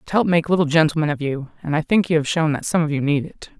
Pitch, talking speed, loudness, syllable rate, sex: 155 Hz, 315 wpm, -20 LUFS, 6.6 syllables/s, female